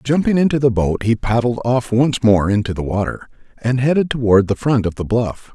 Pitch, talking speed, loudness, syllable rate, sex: 115 Hz, 215 wpm, -17 LUFS, 5.3 syllables/s, male